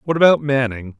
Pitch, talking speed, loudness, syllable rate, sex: 130 Hz, 180 wpm, -17 LUFS, 5.8 syllables/s, male